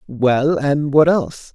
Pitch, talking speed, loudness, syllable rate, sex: 140 Hz, 115 wpm, -16 LUFS, 3.6 syllables/s, male